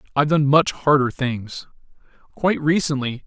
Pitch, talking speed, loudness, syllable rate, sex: 145 Hz, 130 wpm, -20 LUFS, 5.3 syllables/s, male